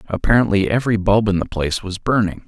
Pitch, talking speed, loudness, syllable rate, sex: 100 Hz, 195 wpm, -18 LUFS, 6.6 syllables/s, male